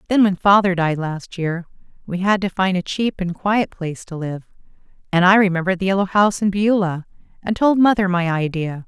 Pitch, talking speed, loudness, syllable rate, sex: 185 Hz, 205 wpm, -19 LUFS, 5.5 syllables/s, female